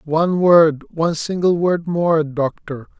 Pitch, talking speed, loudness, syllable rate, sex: 160 Hz, 120 wpm, -17 LUFS, 4.0 syllables/s, male